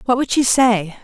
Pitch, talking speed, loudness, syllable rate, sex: 235 Hz, 230 wpm, -15 LUFS, 4.7 syllables/s, female